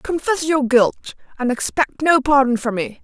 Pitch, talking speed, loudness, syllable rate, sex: 270 Hz, 180 wpm, -18 LUFS, 4.4 syllables/s, female